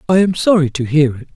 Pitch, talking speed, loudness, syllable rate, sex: 155 Hz, 265 wpm, -15 LUFS, 6.1 syllables/s, female